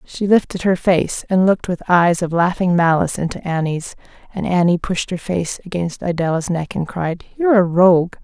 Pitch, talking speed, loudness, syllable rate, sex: 175 Hz, 190 wpm, -17 LUFS, 5.2 syllables/s, female